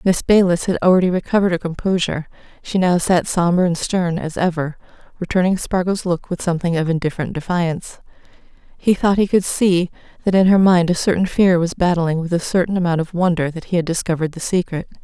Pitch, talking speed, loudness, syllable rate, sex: 175 Hz, 195 wpm, -18 LUFS, 6.1 syllables/s, female